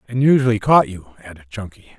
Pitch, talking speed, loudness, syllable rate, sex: 110 Hz, 180 wpm, -16 LUFS, 6.2 syllables/s, male